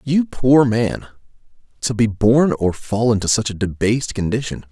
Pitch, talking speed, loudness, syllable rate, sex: 115 Hz, 165 wpm, -18 LUFS, 4.7 syllables/s, male